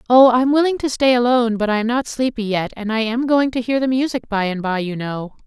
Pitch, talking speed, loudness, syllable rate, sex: 235 Hz, 275 wpm, -18 LUFS, 5.8 syllables/s, female